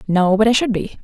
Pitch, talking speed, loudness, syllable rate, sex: 210 Hz, 230 wpm, -16 LUFS, 5.9 syllables/s, female